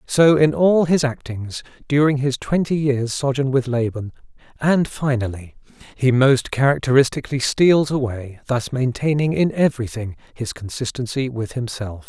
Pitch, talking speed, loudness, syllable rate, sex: 130 Hz, 140 wpm, -19 LUFS, 4.7 syllables/s, male